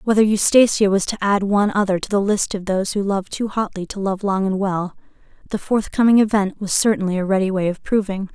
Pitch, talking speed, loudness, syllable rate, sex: 200 Hz, 225 wpm, -19 LUFS, 5.8 syllables/s, female